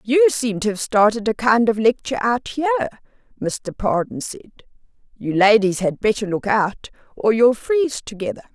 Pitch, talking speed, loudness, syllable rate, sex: 225 Hz, 170 wpm, -19 LUFS, 5.2 syllables/s, female